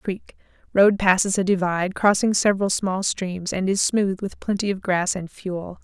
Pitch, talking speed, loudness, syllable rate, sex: 190 Hz, 175 wpm, -21 LUFS, 4.6 syllables/s, female